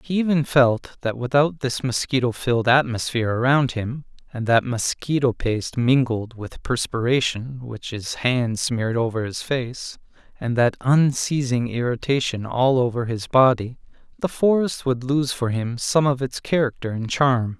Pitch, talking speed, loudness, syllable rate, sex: 125 Hz, 155 wpm, -21 LUFS, 4.5 syllables/s, male